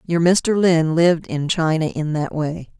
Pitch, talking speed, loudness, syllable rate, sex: 160 Hz, 195 wpm, -19 LUFS, 4.5 syllables/s, female